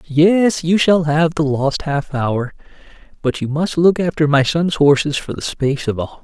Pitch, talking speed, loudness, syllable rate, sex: 155 Hz, 220 wpm, -16 LUFS, 5.0 syllables/s, male